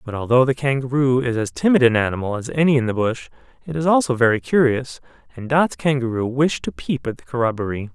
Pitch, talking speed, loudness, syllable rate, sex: 130 Hz, 210 wpm, -19 LUFS, 6.1 syllables/s, male